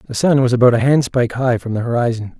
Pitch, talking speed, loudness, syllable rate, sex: 125 Hz, 250 wpm, -16 LUFS, 6.8 syllables/s, male